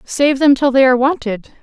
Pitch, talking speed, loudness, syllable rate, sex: 265 Hz, 220 wpm, -13 LUFS, 5.5 syllables/s, female